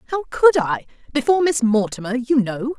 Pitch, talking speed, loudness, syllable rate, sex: 260 Hz, 170 wpm, -19 LUFS, 5.3 syllables/s, female